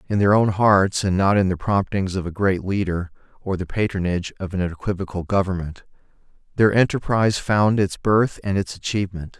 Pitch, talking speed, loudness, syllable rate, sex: 95 Hz, 180 wpm, -21 LUFS, 5.4 syllables/s, male